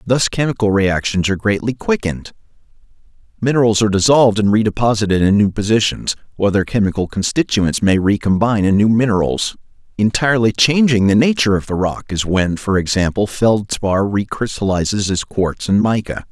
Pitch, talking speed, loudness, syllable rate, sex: 105 Hz, 145 wpm, -16 LUFS, 5.6 syllables/s, male